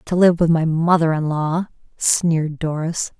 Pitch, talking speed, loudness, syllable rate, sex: 165 Hz, 170 wpm, -18 LUFS, 4.3 syllables/s, female